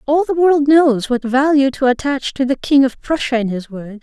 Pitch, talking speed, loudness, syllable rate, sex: 270 Hz, 240 wpm, -15 LUFS, 4.9 syllables/s, female